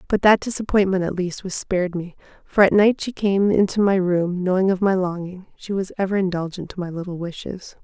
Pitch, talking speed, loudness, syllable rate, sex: 190 Hz, 205 wpm, -21 LUFS, 5.5 syllables/s, female